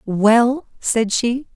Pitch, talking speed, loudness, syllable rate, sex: 235 Hz, 115 wpm, -17 LUFS, 2.4 syllables/s, female